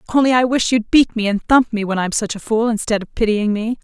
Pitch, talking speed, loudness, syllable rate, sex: 225 Hz, 280 wpm, -17 LUFS, 6.0 syllables/s, female